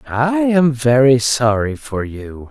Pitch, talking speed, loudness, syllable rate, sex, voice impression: 120 Hz, 145 wpm, -15 LUFS, 3.4 syllables/s, male, masculine, adult-like, relaxed, weak, dark, calm, slightly mature, reassuring, wild, kind, modest